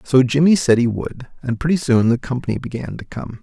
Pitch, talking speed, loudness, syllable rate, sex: 130 Hz, 230 wpm, -18 LUFS, 5.6 syllables/s, male